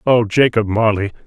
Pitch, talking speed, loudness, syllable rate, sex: 110 Hz, 140 wpm, -16 LUFS, 4.9 syllables/s, male